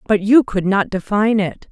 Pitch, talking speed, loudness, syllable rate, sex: 200 Hz, 210 wpm, -16 LUFS, 5.2 syllables/s, female